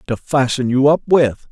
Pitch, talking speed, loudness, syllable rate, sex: 135 Hz, 200 wpm, -15 LUFS, 4.6 syllables/s, male